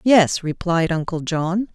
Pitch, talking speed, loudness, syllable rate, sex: 175 Hz, 140 wpm, -20 LUFS, 3.7 syllables/s, female